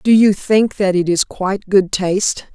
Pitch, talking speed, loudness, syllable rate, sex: 195 Hz, 210 wpm, -15 LUFS, 4.5 syllables/s, female